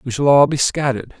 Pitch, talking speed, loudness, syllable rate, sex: 130 Hz, 250 wpm, -16 LUFS, 6.4 syllables/s, male